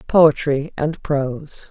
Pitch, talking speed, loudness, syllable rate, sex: 150 Hz, 105 wpm, -19 LUFS, 3.3 syllables/s, female